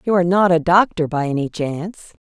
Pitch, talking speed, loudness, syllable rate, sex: 170 Hz, 210 wpm, -17 LUFS, 6.3 syllables/s, female